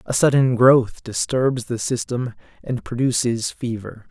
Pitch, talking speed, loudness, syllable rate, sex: 120 Hz, 130 wpm, -20 LUFS, 4.1 syllables/s, male